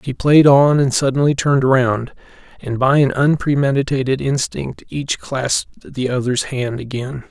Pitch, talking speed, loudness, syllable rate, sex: 135 Hz, 150 wpm, -17 LUFS, 4.5 syllables/s, male